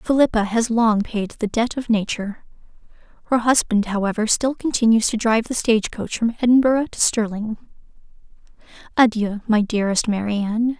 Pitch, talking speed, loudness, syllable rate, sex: 225 Hz, 140 wpm, -20 LUFS, 5.3 syllables/s, female